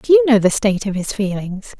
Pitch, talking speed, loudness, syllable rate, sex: 200 Hz, 270 wpm, -17 LUFS, 6.3 syllables/s, female